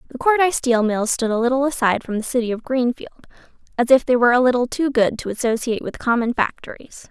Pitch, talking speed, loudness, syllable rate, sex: 245 Hz, 220 wpm, -19 LUFS, 6.7 syllables/s, female